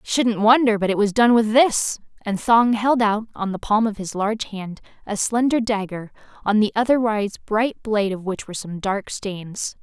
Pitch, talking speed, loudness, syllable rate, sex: 215 Hz, 200 wpm, -20 LUFS, 4.8 syllables/s, female